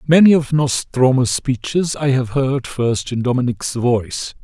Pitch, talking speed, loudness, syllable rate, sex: 130 Hz, 150 wpm, -17 LUFS, 4.2 syllables/s, male